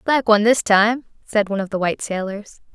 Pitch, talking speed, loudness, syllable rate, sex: 215 Hz, 220 wpm, -19 LUFS, 6.0 syllables/s, female